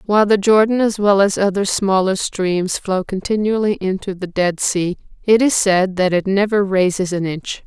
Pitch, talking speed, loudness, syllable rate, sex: 195 Hz, 190 wpm, -17 LUFS, 4.7 syllables/s, female